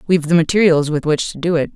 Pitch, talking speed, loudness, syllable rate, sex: 165 Hz, 275 wpm, -16 LUFS, 7.0 syllables/s, female